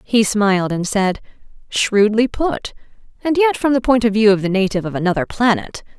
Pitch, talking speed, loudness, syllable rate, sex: 215 Hz, 190 wpm, -17 LUFS, 5.4 syllables/s, female